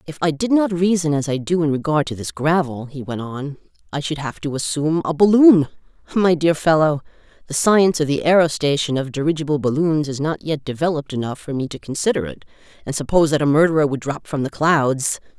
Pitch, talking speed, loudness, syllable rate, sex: 155 Hz, 205 wpm, -19 LUFS, 5.9 syllables/s, female